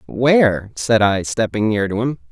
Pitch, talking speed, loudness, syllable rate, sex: 115 Hz, 180 wpm, -17 LUFS, 4.4 syllables/s, male